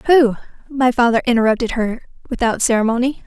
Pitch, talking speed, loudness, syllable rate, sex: 240 Hz, 130 wpm, -17 LUFS, 6.2 syllables/s, female